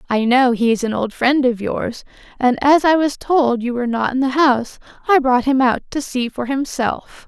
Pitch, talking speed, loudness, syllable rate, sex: 255 Hz, 225 wpm, -17 LUFS, 4.8 syllables/s, female